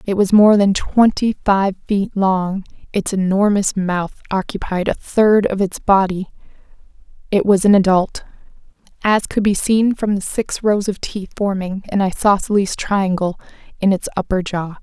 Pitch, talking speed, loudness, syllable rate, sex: 195 Hz, 160 wpm, -17 LUFS, 4.4 syllables/s, female